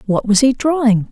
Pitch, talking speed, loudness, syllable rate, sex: 245 Hz, 215 wpm, -14 LUFS, 5.2 syllables/s, female